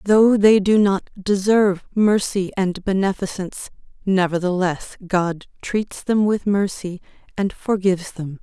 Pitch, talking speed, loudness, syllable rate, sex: 190 Hz, 120 wpm, -19 LUFS, 4.2 syllables/s, female